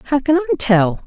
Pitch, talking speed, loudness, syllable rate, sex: 265 Hz, 225 wpm, -16 LUFS, 5.6 syllables/s, female